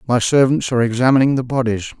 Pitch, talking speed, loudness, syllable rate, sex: 125 Hz, 180 wpm, -16 LUFS, 6.9 syllables/s, male